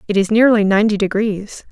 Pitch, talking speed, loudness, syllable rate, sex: 210 Hz, 175 wpm, -15 LUFS, 5.8 syllables/s, female